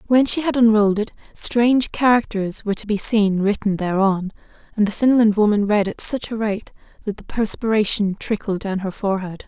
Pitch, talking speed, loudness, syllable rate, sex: 210 Hz, 185 wpm, -19 LUFS, 5.4 syllables/s, female